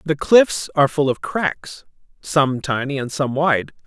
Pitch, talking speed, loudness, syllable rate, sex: 145 Hz, 170 wpm, -19 LUFS, 4.0 syllables/s, male